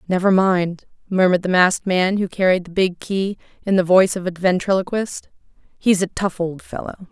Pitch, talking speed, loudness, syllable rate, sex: 185 Hz, 185 wpm, -19 LUFS, 5.6 syllables/s, female